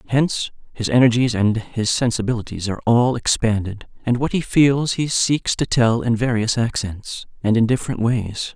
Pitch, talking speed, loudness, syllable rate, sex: 115 Hz, 170 wpm, -19 LUFS, 4.9 syllables/s, male